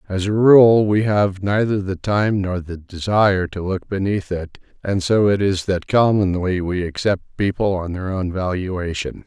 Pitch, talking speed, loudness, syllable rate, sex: 95 Hz, 180 wpm, -19 LUFS, 4.3 syllables/s, male